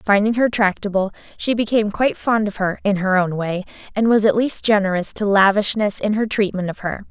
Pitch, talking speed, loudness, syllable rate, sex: 205 Hz, 210 wpm, -19 LUFS, 5.7 syllables/s, female